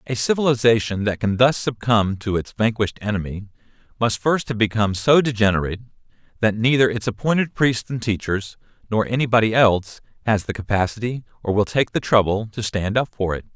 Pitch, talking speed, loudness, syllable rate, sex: 110 Hz, 175 wpm, -20 LUFS, 5.8 syllables/s, male